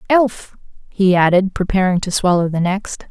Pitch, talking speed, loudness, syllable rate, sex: 190 Hz, 155 wpm, -16 LUFS, 4.7 syllables/s, female